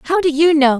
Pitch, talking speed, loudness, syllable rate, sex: 305 Hz, 305 wpm, -14 LUFS, 5.3 syllables/s, female